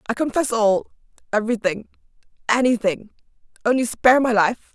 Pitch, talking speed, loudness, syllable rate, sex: 230 Hz, 90 wpm, -20 LUFS, 5.8 syllables/s, female